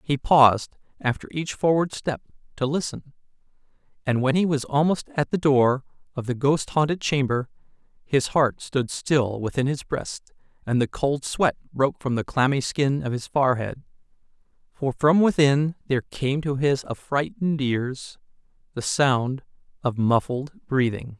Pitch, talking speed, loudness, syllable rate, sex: 140 Hz, 155 wpm, -23 LUFS, 4.5 syllables/s, male